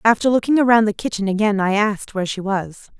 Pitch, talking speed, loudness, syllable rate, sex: 210 Hz, 220 wpm, -18 LUFS, 6.0 syllables/s, female